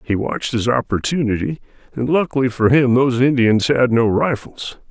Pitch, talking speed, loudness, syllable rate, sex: 125 Hz, 160 wpm, -17 LUFS, 5.3 syllables/s, male